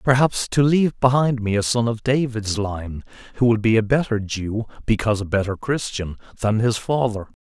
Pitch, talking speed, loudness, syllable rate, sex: 115 Hz, 185 wpm, -21 LUFS, 5.2 syllables/s, male